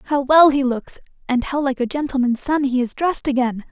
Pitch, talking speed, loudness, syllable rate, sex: 265 Hz, 225 wpm, -19 LUFS, 5.4 syllables/s, female